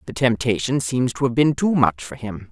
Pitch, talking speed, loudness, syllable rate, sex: 120 Hz, 240 wpm, -20 LUFS, 5.1 syllables/s, female